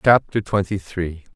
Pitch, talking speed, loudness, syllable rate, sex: 95 Hz, 135 wpm, -22 LUFS, 4.2 syllables/s, male